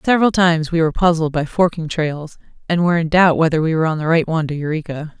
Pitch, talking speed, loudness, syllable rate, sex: 160 Hz, 240 wpm, -17 LUFS, 6.9 syllables/s, female